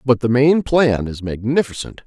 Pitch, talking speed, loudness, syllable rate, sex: 125 Hz, 175 wpm, -17 LUFS, 4.6 syllables/s, male